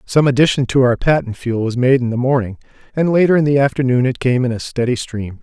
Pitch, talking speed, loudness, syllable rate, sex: 130 Hz, 245 wpm, -16 LUFS, 6.1 syllables/s, male